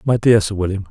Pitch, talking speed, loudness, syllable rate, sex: 100 Hz, 265 wpm, -16 LUFS, 6.3 syllables/s, male